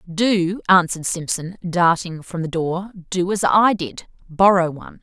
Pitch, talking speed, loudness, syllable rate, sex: 180 Hz, 145 wpm, -19 LUFS, 4.2 syllables/s, female